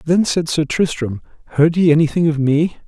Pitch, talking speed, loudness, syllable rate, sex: 155 Hz, 190 wpm, -16 LUFS, 5.2 syllables/s, male